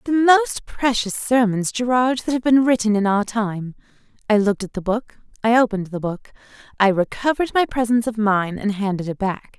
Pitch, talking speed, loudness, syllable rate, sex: 220 Hz, 195 wpm, -20 LUFS, 5.4 syllables/s, female